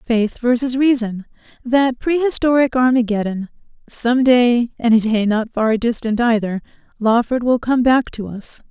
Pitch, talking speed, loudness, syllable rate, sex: 240 Hz, 140 wpm, -17 LUFS, 4.4 syllables/s, female